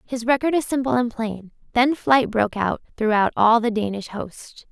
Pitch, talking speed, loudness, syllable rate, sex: 230 Hz, 180 wpm, -21 LUFS, 4.8 syllables/s, female